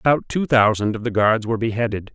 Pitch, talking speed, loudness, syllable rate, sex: 115 Hz, 225 wpm, -19 LUFS, 6.2 syllables/s, male